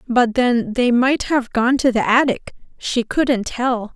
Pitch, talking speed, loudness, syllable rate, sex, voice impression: 245 Hz, 165 wpm, -18 LUFS, 3.7 syllables/s, female, feminine, slightly adult-like, sincere, slightly calm, slightly friendly, reassuring, slightly kind